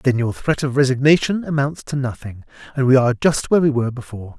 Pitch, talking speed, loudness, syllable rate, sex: 135 Hz, 220 wpm, -18 LUFS, 6.5 syllables/s, male